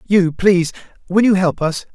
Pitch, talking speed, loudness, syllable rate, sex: 180 Hz, 155 wpm, -16 LUFS, 5.1 syllables/s, male